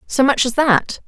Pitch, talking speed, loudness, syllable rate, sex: 260 Hz, 225 wpm, -16 LUFS, 4.3 syllables/s, female